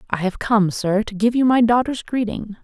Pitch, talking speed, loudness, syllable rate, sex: 220 Hz, 230 wpm, -19 LUFS, 5.0 syllables/s, female